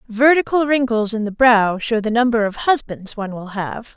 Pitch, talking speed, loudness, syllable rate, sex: 230 Hz, 195 wpm, -17 LUFS, 5.0 syllables/s, female